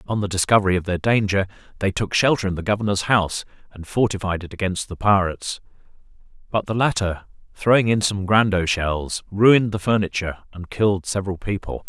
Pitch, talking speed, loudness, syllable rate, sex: 100 Hz, 170 wpm, -21 LUFS, 6.0 syllables/s, male